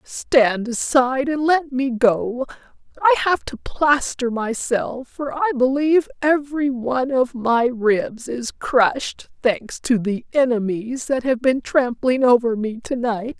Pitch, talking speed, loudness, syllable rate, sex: 255 Hz, 150 wpm, -20 LUFS, 3.9 syllables/s, female